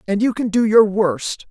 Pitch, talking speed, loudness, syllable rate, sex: 210 Hz, 240 wpm, -17 LUFS, 4.4 syllables/s, female